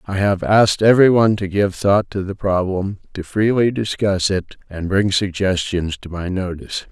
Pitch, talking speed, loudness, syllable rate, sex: 100 Hz, 175 wpm, -18 LUFS, 4.9 syllables/s, male